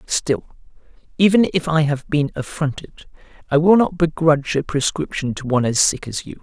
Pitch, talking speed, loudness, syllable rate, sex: 150 Hz, 175 wpm, -19 LUFS, 5.4 syllables/s, male